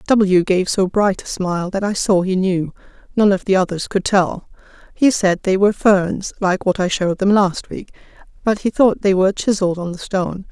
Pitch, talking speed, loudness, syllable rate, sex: 190 Hz, 215 wpm, -17 LUFS, 5.2 syllables/s, female